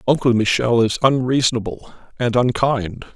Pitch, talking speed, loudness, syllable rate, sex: 120 Hz, 95 wpm, -18 LUFS, 5.0 syllables/s, male